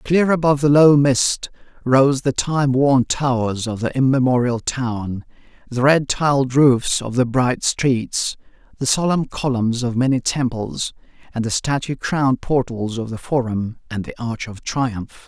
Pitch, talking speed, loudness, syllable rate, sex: 130 Hz, 160 wpm, -19 LUFS, 4.2 syllables/s, male